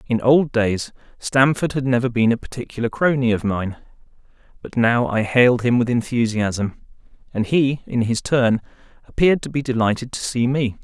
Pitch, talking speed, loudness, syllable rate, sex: 120 Hz, 170 wpm, -19 LUFS, 5.1 syllables/s, male